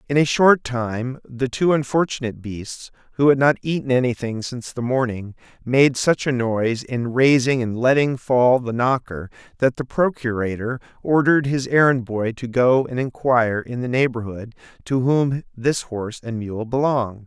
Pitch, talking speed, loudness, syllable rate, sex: 125 Hz, 165 wpm, -20 LUFS, 4.8 syllables/s, male